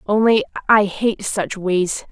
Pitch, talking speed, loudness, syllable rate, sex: 205 Hz, 140 wpm, -18 LUFS, 3.6 syllables/s, female